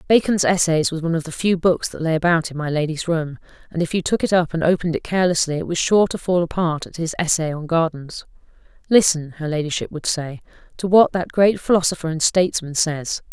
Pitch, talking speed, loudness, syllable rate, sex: 165 Hz, 220 wpm, -19 LUFS, 6.0 syllables/s, female